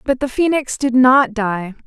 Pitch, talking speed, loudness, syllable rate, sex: 250 Hz, 195 wpm, -16 LUFS, 4.2 syllables/s, female